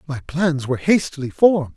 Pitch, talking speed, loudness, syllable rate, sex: 150 Hz, 170 wpm, -19 LUFS, 6.0 syllables/s, male